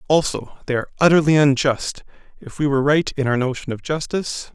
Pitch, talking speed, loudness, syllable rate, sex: 140 Hz, 185 wpm, -19 LUFS, 6.2 syllables/s, male